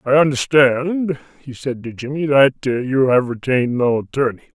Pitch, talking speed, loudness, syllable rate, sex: 135 Hz, 155 wpm, -17 LUFS, 4.8 syllables/s, male